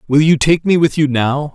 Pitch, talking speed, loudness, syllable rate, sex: 145 Hz, 270 wpm, -14 LUFS, 5.0 syllables/s, male